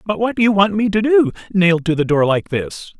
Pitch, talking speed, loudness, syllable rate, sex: 195 Hz, 280 wpm, -16 LUFS, 5.7 syllables/s, male